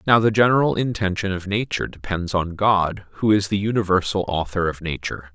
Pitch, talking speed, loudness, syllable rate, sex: 95 Hz, 180 wpm, -21 LUFS, 5.7 syllables/s, male